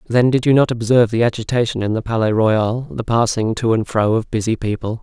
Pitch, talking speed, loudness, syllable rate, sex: 115 Hz, 225 wpm, -17 LUFS, 5.8 syllables/s, male